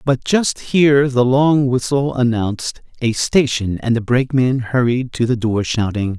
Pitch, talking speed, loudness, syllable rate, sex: 125 Hz, 165 wpm, -17 LUFS, 4.4 syllables/s, male